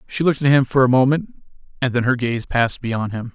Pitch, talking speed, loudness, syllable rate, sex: 130 Hz, 250 wpm, -18 LUFS, 6.4 syllables/s, male